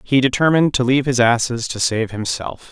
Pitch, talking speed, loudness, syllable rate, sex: 125 Hz, 200 wpm, -17 LUFS, 5.8 syllables/s, male